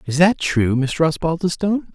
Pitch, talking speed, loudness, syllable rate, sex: 160 Hz, 155 wpm, -19 LUFS, 5.0 syllables/s, male